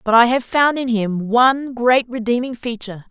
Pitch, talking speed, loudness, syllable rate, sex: 240 Hz, 195 wpm, -17 LUFS, 5.0 syllables/s, female